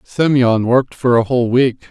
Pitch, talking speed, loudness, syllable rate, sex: 125 Hz, 190 wpm, -14 LUFS, 5.4 syllables/s, male